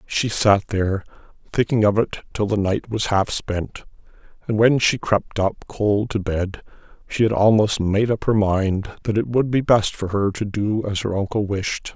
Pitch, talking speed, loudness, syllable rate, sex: 105 Hz, 200 wpm, -20 LUFS, 4.5 syllables/s, male